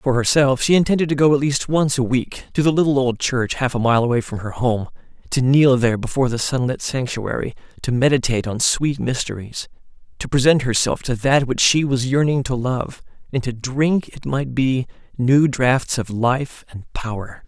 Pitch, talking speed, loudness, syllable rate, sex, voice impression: 130 Hz, 200 wpm, -19 LUFS, 5.0 syllables/s, male, masculine, adult-like, tensed, powerful, slightly bright, clear, fluent, cool, intellectual, calm, friendly, slightly reassuring, wild, lively